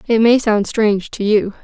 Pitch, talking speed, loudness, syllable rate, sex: 215 Hz, 220 wpm, -15 LUFS, 5.0 syllables/s, female